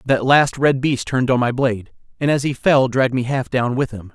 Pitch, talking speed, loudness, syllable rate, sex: 130 Hz, 260 wpm, -18 LUFS, 5.5 syllables/s, male